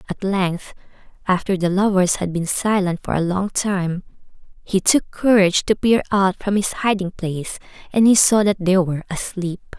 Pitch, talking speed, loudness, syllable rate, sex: 190 Hz, 180 wpm, -19 LUFS, 4.8 syllables/s, female